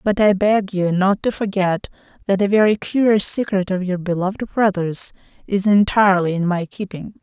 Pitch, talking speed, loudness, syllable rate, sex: 195 Hz, 175 wpm, -18 LUFS, 5.0 syllables/s, female